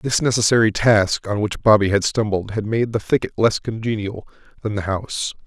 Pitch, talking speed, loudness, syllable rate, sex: 110 Hz, 185 wpm, -19 LUFS, 5.4 syllables/s, male